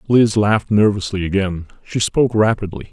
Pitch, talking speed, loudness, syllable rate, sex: 100 Hz, 145 wpm, -17 LUFS, 5.5 syllables/s, male